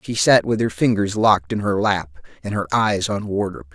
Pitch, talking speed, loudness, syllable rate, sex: 100 Hz, 225 wpm, -19 LUFS, 5.3 syllables/s, male